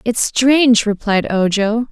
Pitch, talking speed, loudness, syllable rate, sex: 225 Hz, 125 wpm, -14 LUFS, 3.9 syllables/s, female